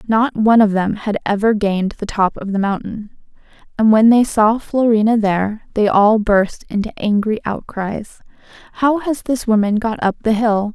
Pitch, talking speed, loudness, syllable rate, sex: 215 Hz, 180 wpm, -16 LUFS, 4.7 syllables/s, female